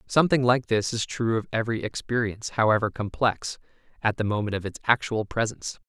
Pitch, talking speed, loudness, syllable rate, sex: 115 Hz, 175 wpm, -25 LUFS, 6.0 syllables/s, male